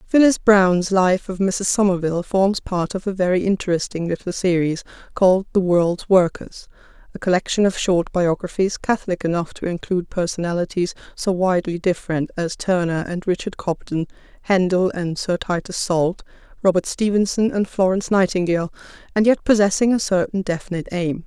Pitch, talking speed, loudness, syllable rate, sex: 185 Hz, 145 wpm, -20 LUFS, 5.5 syllables/s, female